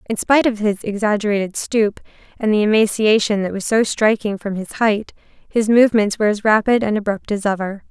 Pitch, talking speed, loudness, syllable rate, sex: 210 Hz, 190 wpm, -17 LUFS, 5.8 syllables/s, female